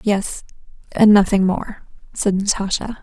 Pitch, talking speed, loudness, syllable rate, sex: 200 Hz, 120 wpm, -17 LUFS, 4.2 syllables/s, female